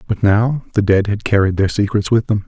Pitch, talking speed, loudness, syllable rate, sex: 105 Hz, 245 wpm, -16 LUFS, 5.5 syllables/s, male